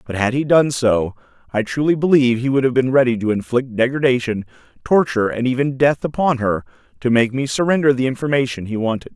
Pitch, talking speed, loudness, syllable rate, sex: 125 Hz, 195 wpm, -18 LUFS, 6.1 syllables/s, male